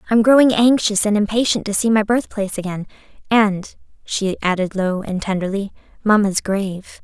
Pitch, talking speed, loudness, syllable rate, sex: 205 Hz, 155 wpm, -18 LUFS, 5.3 syllables/s, female